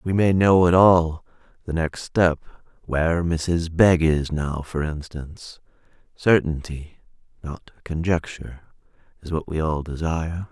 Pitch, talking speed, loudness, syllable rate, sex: 80 Hz, 130 wpm, -21 LUFS, 4.2 syllables/s, male